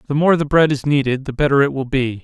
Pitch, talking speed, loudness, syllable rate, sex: 140 Hz, 295 wpm, -17 LUFS, 6.3 syllables/s, male